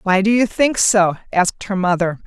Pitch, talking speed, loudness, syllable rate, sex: 200 Hz, 210 wpm, -16 LUFS, 5.1 syllables/s, female